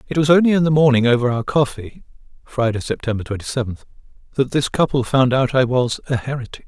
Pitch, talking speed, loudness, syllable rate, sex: 130 Hz, 200 wpm, -18 LUFS, 5.2 syllables/s, male